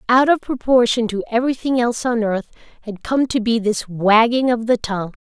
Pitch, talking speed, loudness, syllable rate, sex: 230 Hz, 195 wpm, -18 LUFS, 5.5 syllables/s, female